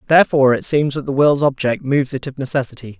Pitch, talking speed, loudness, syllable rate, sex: 135 Hz, 220 wpm, -17 LUFS, 6.8 syllables/s, male